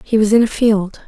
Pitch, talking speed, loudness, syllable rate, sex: 215 Hz, 280 wpm, -14 LUFS, 5.3 syllables/s, female